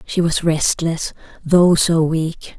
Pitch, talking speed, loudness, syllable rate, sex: 165 Hz, 140 wpm, -17 LUFS, 3.2 syllables/s, female